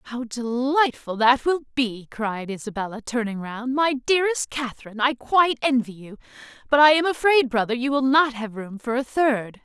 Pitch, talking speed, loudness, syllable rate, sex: 250 Hz, 180 wpm, -22 LUFS, 5.2 syllables/s, female